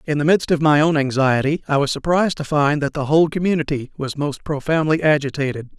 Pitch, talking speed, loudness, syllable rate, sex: 150 Hz, 210 wpm, -19 LUFS, 6.0 syllables/s, male